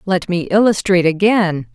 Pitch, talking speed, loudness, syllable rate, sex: 185 Hz, 135 wpm, -15 LUFS, 5.0 syllables/s, female